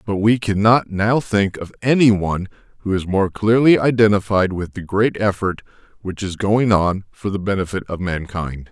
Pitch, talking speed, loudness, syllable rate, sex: 100 Hz, 180 wpm, -18 LUFS, 4.8 syllables/s, male